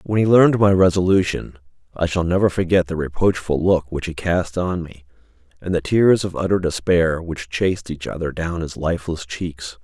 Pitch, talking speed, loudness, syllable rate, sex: 90 Hz, 190 wpm, -19 LUFS, 5.1 syllables/s, male